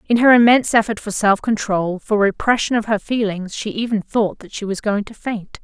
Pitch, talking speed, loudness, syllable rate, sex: 215 Hz, 225 wpm, -18 LUFS, 5.3 syllables/s, female